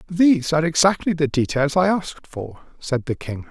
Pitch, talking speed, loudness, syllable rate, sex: 155 Hz, 190 wpm, -20 LUFS, 5.4 syllables/s, male